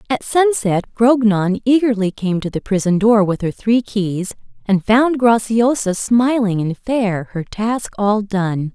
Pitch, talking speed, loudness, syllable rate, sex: 215 Hz, 160 wpm, -17 LUFS, 3.9 syllables/s, female